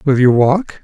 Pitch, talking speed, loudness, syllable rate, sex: 140 Hz, 215 wpm, -12 LUFS, 4.2 syllables/s, male